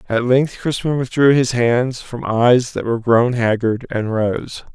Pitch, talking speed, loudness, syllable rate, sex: 120 Hz, 175 wpm, -17 LUFS, 4.0 syllables/s, male